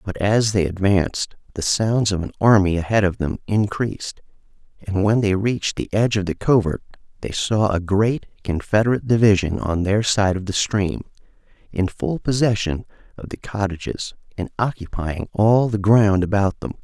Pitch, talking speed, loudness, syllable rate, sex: 100 Hz, 170 wpm, -20 LUFS, 5.0 syllables/s, male